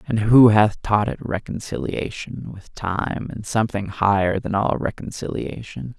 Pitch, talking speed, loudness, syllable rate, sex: 105 Hz, 140 wpm, -21 LUFS, 4.3 syllables/s, male